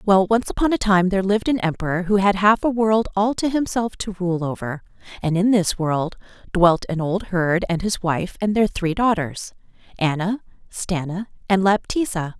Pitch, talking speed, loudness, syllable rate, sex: 195 Hz, 190 wpm, -21 LUFS, 4.9 syllables/s, female